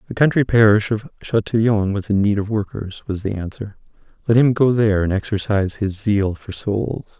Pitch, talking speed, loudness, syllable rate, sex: 105 Hz, 190 wpm, -19 LUFS, 5.2 syllables/s, male